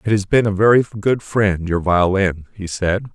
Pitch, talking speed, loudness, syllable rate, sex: 100 Hz, 210 wpm, -17 LUFS, 4.5 syllables/s, male